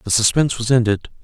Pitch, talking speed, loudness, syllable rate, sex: 115 Hz, 195 wpm, -17 LUFS, 6.9 syllables/s, male